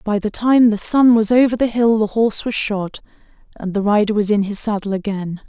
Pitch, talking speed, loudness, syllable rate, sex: 215 Hz, 230 wpm, -16 LUFS, 5.4 syllables/s, female